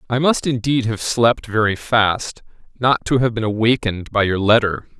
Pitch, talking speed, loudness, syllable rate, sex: 115 Hz, 180 wpm, -18 LUFS, 4.9 syllables/s, male